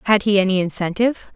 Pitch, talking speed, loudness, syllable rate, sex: 200 Hz, 175 wpm, -18 LUFS, 6.7 syllables/s, female